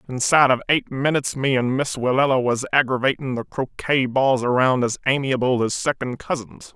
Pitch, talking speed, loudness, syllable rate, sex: 130 Hz, 170 wpm, -20 LUFS, 5.4 syllables/s, male